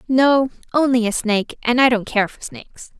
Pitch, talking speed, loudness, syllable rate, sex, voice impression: 245 Hz, 200 wpm, -18 LUFS, 5.2 syllables/s, female, very feminine, adult-like, slightly clear, slightly refreshing, sincere